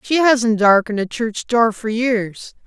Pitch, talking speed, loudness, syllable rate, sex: 225 Hz, 180 wpm, -17 LUFS, 4.0 syllables/s, female